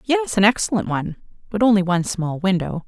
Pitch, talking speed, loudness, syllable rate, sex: 200 Hz, 190 wpm, -19 LUFS, 6.2 syllables/s, female